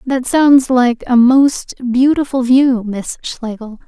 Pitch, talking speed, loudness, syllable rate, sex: 250 Hz, 140 wpm, -13 LUFS, 3.4 syllables/s, female